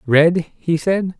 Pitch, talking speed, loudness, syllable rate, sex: 170 Hz, 150 wpm, -17 LUFS, 3.0 syllables/s, male